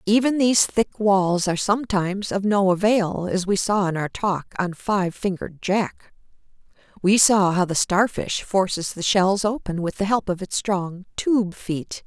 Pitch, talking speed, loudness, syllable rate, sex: 195 Hz, 180 wpm, -21 LUFS, 4.4 syllables/s, female